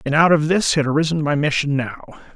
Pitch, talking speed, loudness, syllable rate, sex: 150 Hz, 230 wpm, -18 LUFS, 6.2 syllables/s, male